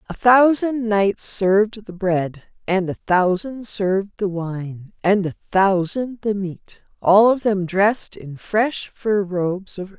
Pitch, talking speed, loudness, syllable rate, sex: 200 Hz, 155 wpm, -20 LUFS, 4.0 syllables/s, female